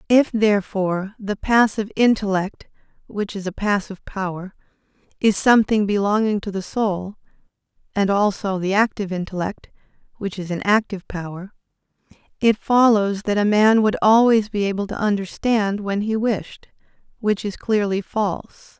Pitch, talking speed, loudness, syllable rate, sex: 205 Hz, 140 wpm, -20 LUFS, 4.9 syllables/s, female